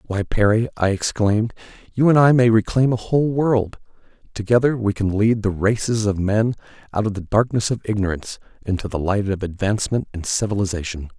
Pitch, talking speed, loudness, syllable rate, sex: 105 Hz, 175 wpm, -20 LUFS, 5.7 syllables/s, male